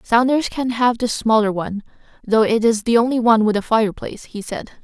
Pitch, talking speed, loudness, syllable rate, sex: 225 Hz, 210 wpm, -18 LUFS, 6.0 syllables/s, female